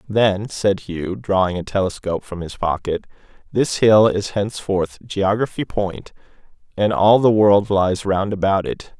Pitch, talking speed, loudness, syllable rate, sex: 100 Hz, 155 wpm, -19 LUFS, 4.3 syllables/s, male